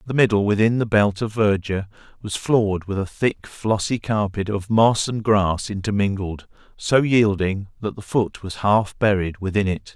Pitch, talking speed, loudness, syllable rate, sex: 105 Hz, 175 wpm, -21 LUFS, 4.7 syllables/s, male